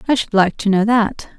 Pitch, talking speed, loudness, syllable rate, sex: 215 Hz, 260 wpm, -16 LUFS, 5.1 syllables/s, female